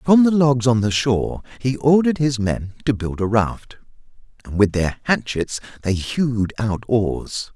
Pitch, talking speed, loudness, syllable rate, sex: 120 Hz, 175 wpm, -20 LUFS, 4.5 syllables/s, male